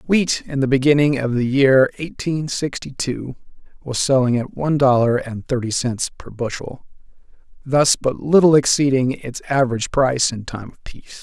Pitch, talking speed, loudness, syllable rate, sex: 130 Hz, 165 wpm, -18 LUFS, 5.0 syllables/s, male